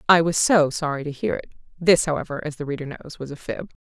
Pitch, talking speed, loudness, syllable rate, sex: 150 Hz, 250 wpm, -22 LUFS, 6.6 syllables/s, female